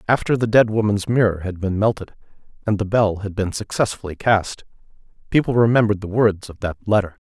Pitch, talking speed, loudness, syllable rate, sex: 105 Hz, 180 wpm, -20 LUFS, 5.9 syllables/s, male